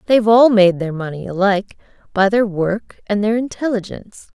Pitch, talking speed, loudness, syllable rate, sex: 205 Hz, 150 wpm, -16 LUFS, 5.3 syllables/s, female